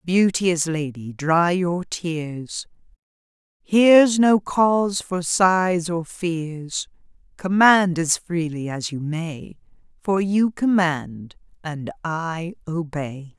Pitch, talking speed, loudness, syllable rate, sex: 170 Hz, 110 wpm, -21 LUFS, 2.9 syllables/s, female